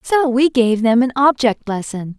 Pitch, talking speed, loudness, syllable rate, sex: 245 Hz, 190 wpm, -16 LUFS, 4.4 syllables/s, female